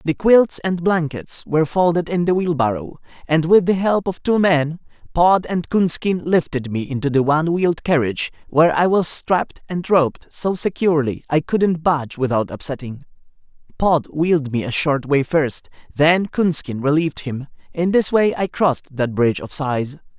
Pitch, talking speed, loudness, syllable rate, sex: 160 Hz, 175 wpm, -19 LUFS, 4.9 syllables/s, male